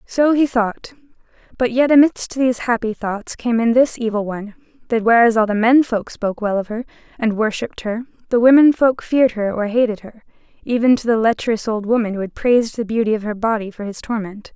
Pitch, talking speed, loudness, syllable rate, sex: 230 Hz, 215 wpm, -17 LUFS, 5.8 syllables/s, female